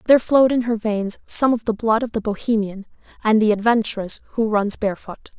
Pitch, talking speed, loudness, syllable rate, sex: 220 Hz, 200 wpm, -19 LUFS, 5.9 syllables/s, female